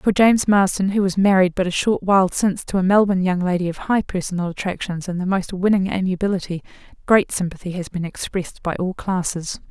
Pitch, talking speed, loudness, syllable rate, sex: 185 Hz, 205 wpm, -20 LUFS, 6.0 syllables/s, female